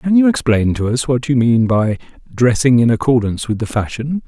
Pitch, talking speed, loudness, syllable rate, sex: 125 Hz, 210 wpm, -15 LUFS, 5.4 syllables/s, male